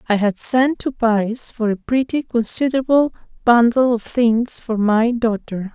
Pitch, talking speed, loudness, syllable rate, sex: 235 Hz, 155 wpm, -18 LUFS, 4.3 syllables/s, female